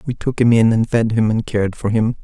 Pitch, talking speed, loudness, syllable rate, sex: 110 Hz, 295 wpm, -17 LUFS, 5.9 syllables/s, male